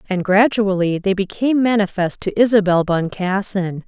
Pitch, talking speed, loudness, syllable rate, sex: 195 Hz, 125 wpm, -17 LUFS, 4.9 syllables/s, female